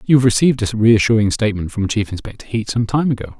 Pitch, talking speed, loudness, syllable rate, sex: 115 Hz, 230 wpm, -17 LUFS, 6.7 syllables/s, male